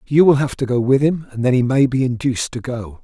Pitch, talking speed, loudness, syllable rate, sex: 130 Hz, 295 wpm, -17 LUFS, 5.9 syllables/s, male